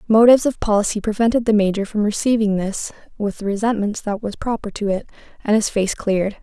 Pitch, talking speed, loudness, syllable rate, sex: 210 Hz, 195 wpm, -19 LUFS, 6.1 syllables/s, female